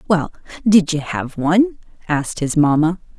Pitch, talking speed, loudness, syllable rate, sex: 170 Hz, 150 wpm, -18 LUFS, 5.0 syllables/s, female